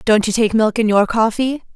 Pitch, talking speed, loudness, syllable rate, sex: 225 Hz, 240 wpm, -16 LUFS, 5.1 syllables/s, female